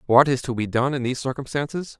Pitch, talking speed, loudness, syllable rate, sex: 130 Hz, 240 wpm, -23 LUFS, 6.6 syllables/s, male